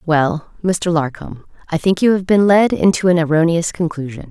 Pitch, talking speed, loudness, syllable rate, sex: 170 Hz, 180 wpm, -16 LUFS, 5.0 syllables/s, female